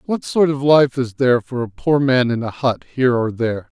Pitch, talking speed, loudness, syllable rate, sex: 130 Hz, 255 wpm, -18 LUFS, 5.4 syllables/s, male